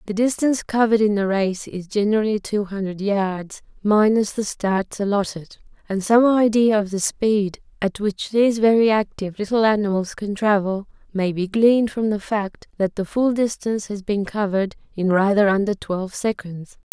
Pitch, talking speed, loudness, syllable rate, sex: 205 Hz, 170 wpm, -20 LUFS, 5.0 syllables/s, female